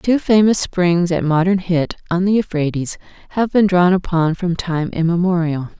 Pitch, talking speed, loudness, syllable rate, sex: 175 Hz, 165 wpm, -17 LUFS, 4.7 syllables/s, female